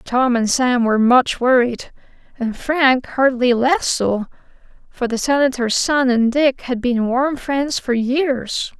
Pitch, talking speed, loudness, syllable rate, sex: 255 Hz, 155 wpm, -17 LUFS, 3.7 syllables/s, female